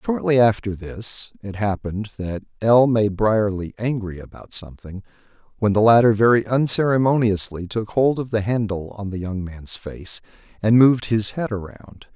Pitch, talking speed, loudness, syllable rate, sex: 110 Hz, 155 wpm, -20 LUFS, 4.8 syllables/s, male